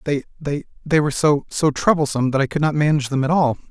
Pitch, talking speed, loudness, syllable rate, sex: 145 Hz, 180 wpm, -19 LUFS, 6.9 syllables/s, male